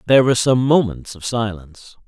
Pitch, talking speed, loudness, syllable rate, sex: 115 Hz, 175 wpm, -17 LUFS, 6.0 syllables/s, male